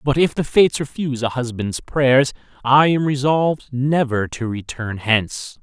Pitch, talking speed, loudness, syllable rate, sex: 130 Hz, 160 wpm, -19 LUFS, 4.7 syllables/s, male